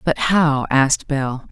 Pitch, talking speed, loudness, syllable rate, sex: 145 Hz, 160 wpm, -17 LUFS, 3.8 syllables/s, female